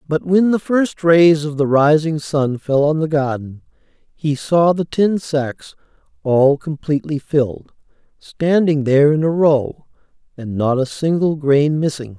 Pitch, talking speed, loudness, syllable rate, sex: 150 Hz, 160 wpm, -16 LUFS, 4.1 syllables/s, male